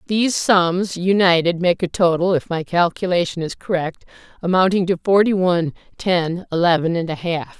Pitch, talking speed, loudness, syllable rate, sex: 175 Hz, 160 wpm, -18 LUFS, 5.0 syllables/s, female